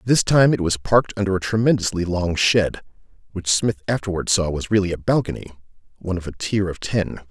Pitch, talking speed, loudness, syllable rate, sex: 100 Hz, 195 wpm, -20 LUFS, 5.8 syllables/s, male